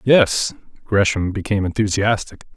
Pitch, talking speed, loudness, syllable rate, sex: 100 Hz, 95 wpm, -19 LUFS, 4.8 syllables/s, male